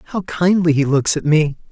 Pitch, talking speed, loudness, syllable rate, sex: 160 Hz, 210 wpm, -16 LUFS, 5.2 syllables/s, male